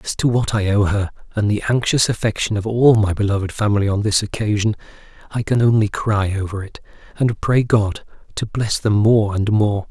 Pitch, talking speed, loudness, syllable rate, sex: 105 Hz, 200 wpm, -18 LUFS, 5.3 syllables/s, male